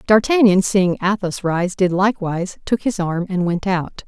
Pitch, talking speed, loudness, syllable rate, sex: 190 Hz, 175 wpm, -18 LUFS, 4.8 syllables/s, female